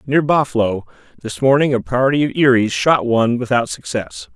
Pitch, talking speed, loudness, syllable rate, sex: 120 Hz, 180 wpm, -16 LUFS, 5.0 syllables/s, male